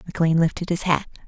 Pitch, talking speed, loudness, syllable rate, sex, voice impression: 165 Hz, 190 wpm, -22 LUFS, 7.3 syllables/s, female, feminine, adult-like, tensed, bright, soft, fluent, calm, friendly, reassuring, elegant, lively, kind